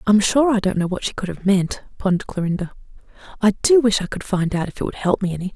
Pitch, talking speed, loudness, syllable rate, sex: 200 Hz, 270 wpm, -20 LUFS, 6.5 syllables/s, female